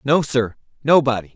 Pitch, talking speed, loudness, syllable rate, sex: 130 Hz, 135 wpm, -19 LUFS, 5.1 syllables/s, male